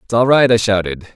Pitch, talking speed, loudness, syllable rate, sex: 110 Hz, 260 wpm, -14 LUFS, 5.7 syllables/s, male